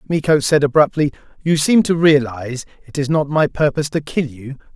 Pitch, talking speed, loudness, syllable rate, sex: 145 Hz, 190 wpm, -17 LUFS, 5.6 syllables/s, male